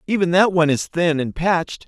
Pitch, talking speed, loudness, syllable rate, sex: 170 Hz, 225 wpm, -18 LUFS, 5.9 syllables/s, male